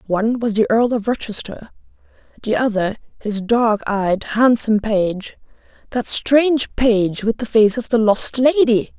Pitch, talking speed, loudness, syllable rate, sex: 230 Hz, 145 wpm, -17 LUFS, 4.3 syllables/s, female